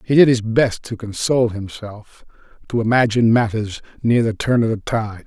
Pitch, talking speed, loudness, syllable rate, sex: 115 Hz, 180 wpm, -18 LUFS, 5.1 syllables/s, male